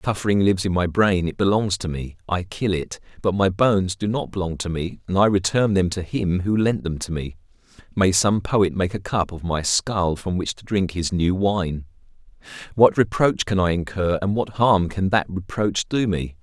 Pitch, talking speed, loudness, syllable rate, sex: 95 Hz, 220 wpm, -21 LUFS, 4.9 syllables/s, male